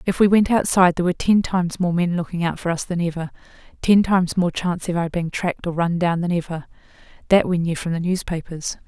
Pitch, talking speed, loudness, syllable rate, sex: 175 Hz, 235 wpm, -20 LUFS, 6.4 syllables/s, female